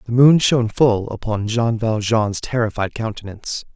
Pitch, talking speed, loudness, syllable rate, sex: 115 Hz, 145 wpm, -18 LUFS, 4.8 syllables/s, male